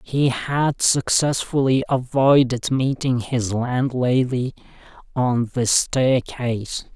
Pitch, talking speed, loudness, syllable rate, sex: 130 Hz, 85 wpm, -20 LUFS, 3.3 syllables/s, male